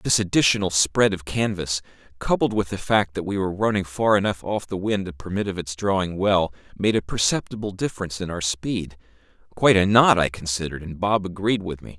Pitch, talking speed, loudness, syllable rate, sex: 95 Hz, 200 wpm, -22 LUFS, 5.8 syllables/s, male